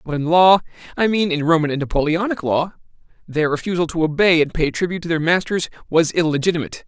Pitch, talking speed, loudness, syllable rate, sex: 170 Hz, 175 wpm, -18 LUFS, 6.5 syllables/s, male